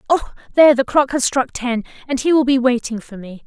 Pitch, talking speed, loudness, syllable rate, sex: 260 Hz, 245 wpm, -17 LUFS, 5.8 syllables/s, female